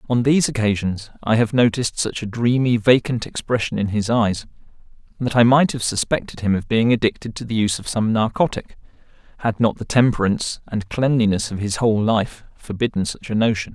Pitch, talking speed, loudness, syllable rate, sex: 115 Hz, 190 wpm, -20 LUFS, 5.7 syllables/s, male